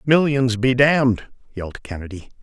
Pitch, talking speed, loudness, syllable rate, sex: 120 Hz, 125 wpm, -18 LUFS, 5.0 syllables/s, male